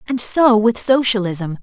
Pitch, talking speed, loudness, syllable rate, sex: 225 Hz, 150 wpm, -15 LUFS, 4.2 syllables/s, female